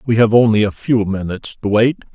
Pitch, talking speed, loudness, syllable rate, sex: 110 Hz, 225 wpm, -15 LUFS, 6.0 syllables/s, male